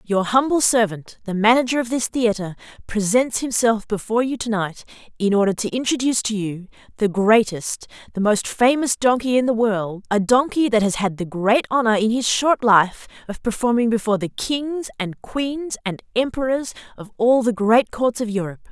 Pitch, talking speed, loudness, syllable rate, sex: 225 Hz, 180 wpm, -20 LUFS, 5.1 syllables/s, female